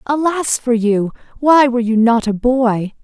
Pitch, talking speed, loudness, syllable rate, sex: 245 Hz, 180 wpm, -15 LUFS, 4.3 syllables/s, female